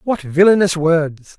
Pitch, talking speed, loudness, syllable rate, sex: 170 Hz, 130 wpm, -14 LUFS, 3.9 syllables/s, male